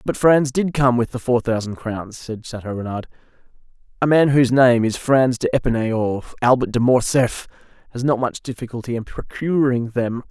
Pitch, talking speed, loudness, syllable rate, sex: 125 Hz, 175 wpm, -19 LUFS, 5.1 syllables/s, male